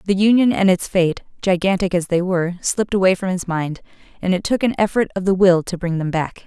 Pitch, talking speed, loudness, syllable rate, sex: 185 Hz, 240 wpm, -18 LUFS, 5.9 syllables/s, female